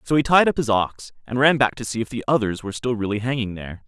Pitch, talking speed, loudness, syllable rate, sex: 120 Hz, 295 wpm, -21 LUFS, 6.6 syllables/s, male